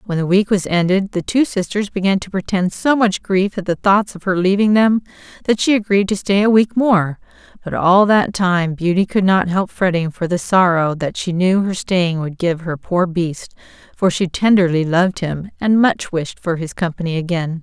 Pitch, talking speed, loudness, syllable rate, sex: 185 Hz, 215 wpm, -17 LUFS, 4.8 syllables/s, female